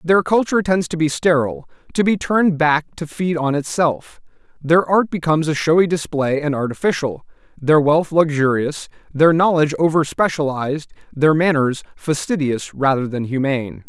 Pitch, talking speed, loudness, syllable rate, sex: 155 Hz, 145 wpm, -18 LUFS, 5.2 syllables/s, male